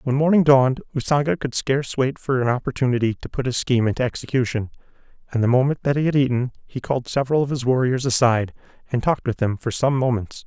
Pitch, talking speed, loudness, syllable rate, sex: 130 Hz, 210 wpm, -21 LUFS, 6.8 syllables/s, male